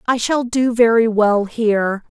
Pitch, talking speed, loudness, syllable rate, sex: 225 Hz, 165 wpm, -16 LUFS, 4.1 syllables/s, female